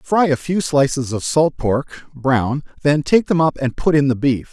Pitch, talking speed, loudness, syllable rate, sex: 140 Hz, 225 wpm, -18 LUFS, 4.5 syllables/s, male